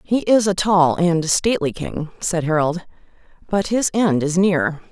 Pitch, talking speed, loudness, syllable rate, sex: 175 Hz, 170 wpm, -18 LUFS, 4.2 syllables/s, female